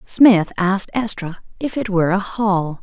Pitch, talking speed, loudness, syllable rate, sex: 195 Hz, 170 wpm, -18 LUFS, 4.4 syllables/s, female